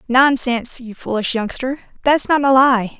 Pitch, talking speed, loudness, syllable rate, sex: 250 Hz, 160 wpm, -17 LUFS, 4.7 syllables/s, female